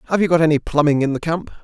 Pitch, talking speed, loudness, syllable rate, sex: 155 Hz, 295 wpm, -17 LUFS, 7.6 syllables/s, male